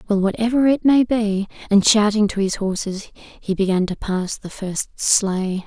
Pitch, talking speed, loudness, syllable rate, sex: 205 Hz, 180 wpm, -19 LUFS, 4.3 syllables/s, female